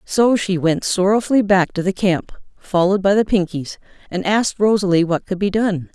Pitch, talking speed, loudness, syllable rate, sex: 190 Hz, 190 wpm, -18 LUFS, 5.3 syllables/s, female